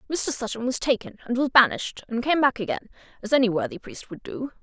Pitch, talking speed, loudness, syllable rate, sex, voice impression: 240 Hz, 220 wpm, -24 LUFS, 6.3 syllables/s, female, feminine, slightly adult-like, slightly calm, slightly unique, slightly elegant